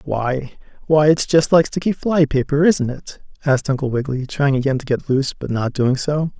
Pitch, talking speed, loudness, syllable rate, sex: 140 Hz, 190 wpm, -18 LUFS, 5.3 syllables/s, male